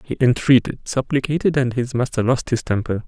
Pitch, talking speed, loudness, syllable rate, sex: 125 Hz, 155 wpm, -19 LUFS, 5.5 syllables/s, male